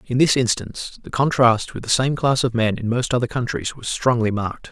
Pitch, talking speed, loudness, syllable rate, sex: 120 Hz, 230 wpm, -20 LUFS, 5.6 syllables/s, male